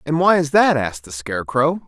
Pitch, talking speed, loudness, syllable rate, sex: 145 Hz, 225 wpm, -18 LUFS, 5.8 syllables/s, male